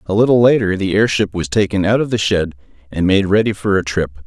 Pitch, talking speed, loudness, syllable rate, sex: 100 Hz, 240 wpm, -16 LUFS, 5.8 syllables/s, male